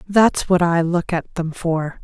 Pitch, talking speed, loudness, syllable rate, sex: 175 Hz, 205 wpm, -19 LUFS, 3.7 syllables/s, female